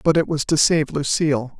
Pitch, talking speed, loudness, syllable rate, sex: 150 Hz, 225 wpm, -19 LUFS, 5.4 syllables/s, female